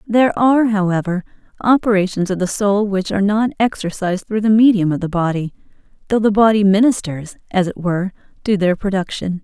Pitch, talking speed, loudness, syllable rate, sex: 200 Hz, 170 wpm, -17 LUFS, 5.9 syllables/s, female